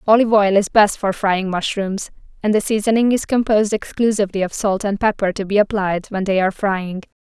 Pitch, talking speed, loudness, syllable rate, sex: 205 Hz, 200 wpm, -18 LUFS, 5.8 syllables/s, female